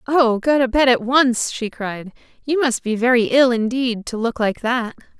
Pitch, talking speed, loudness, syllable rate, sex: 240 Hz, 210 wpm, -18 LUFS, 4.5 syllables/s, female